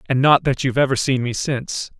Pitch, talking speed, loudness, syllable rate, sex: 130 Hz, 240 wpm, -19 LUFS, 6.3 syllables/s, male